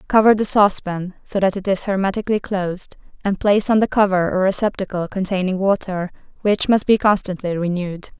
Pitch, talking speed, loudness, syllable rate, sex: 195 Hz, 170 wpm, -19 LUFS, 5.9 syllables/s, female